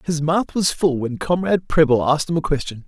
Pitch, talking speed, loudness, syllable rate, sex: 155 Hz, 230 wpm, -19 LUFS, 5.8 syllables/s, male